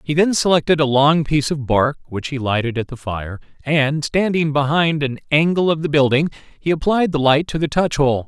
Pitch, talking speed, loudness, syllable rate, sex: 145 Hz, 220 wpm, -18 LUFS, 5.2 syllables/s, male